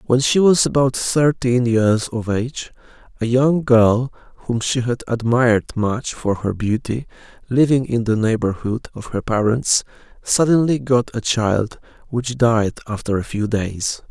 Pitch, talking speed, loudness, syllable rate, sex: 120 Hz, 155 wpm, -18 LUFS, 4.2 syllables/s, male